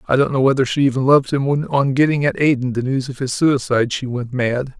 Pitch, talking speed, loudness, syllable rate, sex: 135 Hz, 265 wpm, -17 LUFS, 6.0 syllables/s, male